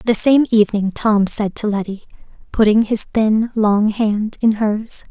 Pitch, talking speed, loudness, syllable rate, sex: 215 Hz, 165 wpm, -16 LUFS, 4.2 syllables/s, female